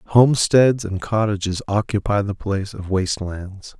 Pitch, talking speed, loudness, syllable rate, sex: 100 Hz, 140 wpm, -20 LUFS, 4.6 syllables/s, male